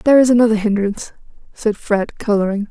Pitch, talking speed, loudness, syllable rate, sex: 215 Hz, 175 wpm, -16 LUFS, 6.8 syllables/s, female